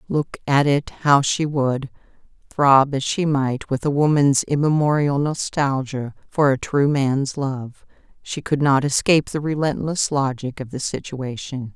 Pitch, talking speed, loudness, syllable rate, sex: 140 Hz, 155 wpm, -20 LUFS, 4.1 syllables/s, female